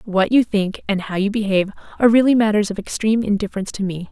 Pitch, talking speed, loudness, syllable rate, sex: 205 Hz, 220 wpm, -18 LUFS, 7.2 syllables/s, female